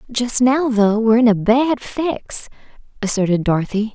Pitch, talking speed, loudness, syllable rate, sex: 230 Hz, 150 wpm, -17 LUFS, 4.7 syllables/s, female